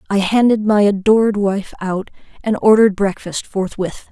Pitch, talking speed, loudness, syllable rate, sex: 205 Hz, 145 wpm, -16 LUFS, 4.9 syllables/s, female